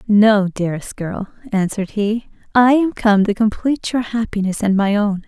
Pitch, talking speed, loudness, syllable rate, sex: 210 Hz, 170 wpm, -17 LUFS, 5.0 syllables/s, female